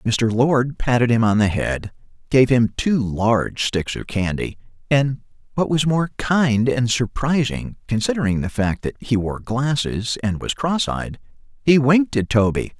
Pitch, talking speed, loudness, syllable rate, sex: 120 Hz, 170 wpm, -20 LUFS, 4.3 syllables/s, male